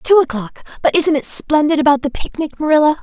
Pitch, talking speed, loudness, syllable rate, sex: 295 Hz, 180 wpm, -15 LUFS, 5.8 syllables/s, female